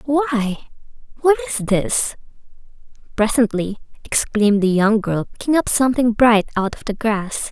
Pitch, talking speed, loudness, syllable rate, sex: 220 Hz, 135 wpm, -18 LUFS, 4.4 syllables/s, female